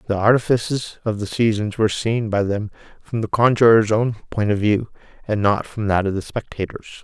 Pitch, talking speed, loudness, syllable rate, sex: 110 Hz, 195 wpm, -20 LUFS, 5.3 syllables/s, male